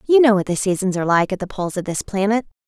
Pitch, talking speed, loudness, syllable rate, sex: 200 Hz, 290 wpm, -19 LUFS, 7.4 syllables/s, female